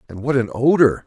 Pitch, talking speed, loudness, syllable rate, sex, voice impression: 125 Hz, 225 wpm, -17 LUFS, 6.0 syllables/s, male, masculine, middle-aged, tensed, slightly weak, hard, muffled, raspy, cool, calm, mature, wild, lively, slightly strict